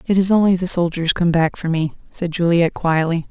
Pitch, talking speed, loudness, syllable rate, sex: 170 Hz, 220 wpm, -17 LUFS, 5.7 syllables/s, female